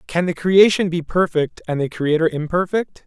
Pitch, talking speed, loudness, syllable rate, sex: 170 Hz, 175 wpm, -18 LUFS, 4.9 syllables/s, male